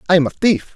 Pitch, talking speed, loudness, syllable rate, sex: 180 Hz, 315 wpm, -16 LUFS, 7.3 syllables/s, male